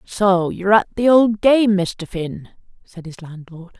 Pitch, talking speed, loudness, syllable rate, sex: 195 Hz, 175 wpm, -17 LUFS, 4.1 syllables/s, female